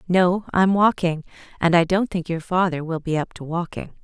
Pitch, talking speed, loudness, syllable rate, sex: 175 Hz, 210 wpm, -21 LUFS, 5.0 syllables/s, female